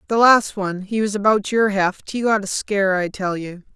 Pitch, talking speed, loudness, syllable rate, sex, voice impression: 200 Hz, 210 wpm, -19 LUFS, 5.2 syllables/s, female, feminine, adult-like, tensed, powerful, slightly bright, clear, intellectual, friendly, elegant, lively, slightly sharp